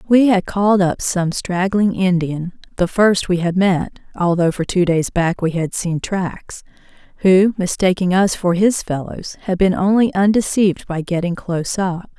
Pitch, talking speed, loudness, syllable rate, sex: 185 Hz, 165 wpm, -17 LUFS, 4.5 syllables/s, female